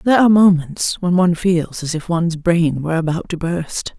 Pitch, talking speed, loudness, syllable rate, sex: 170 Hz, 210 wpm, -17 LUFS, 5.4 syllables/s, female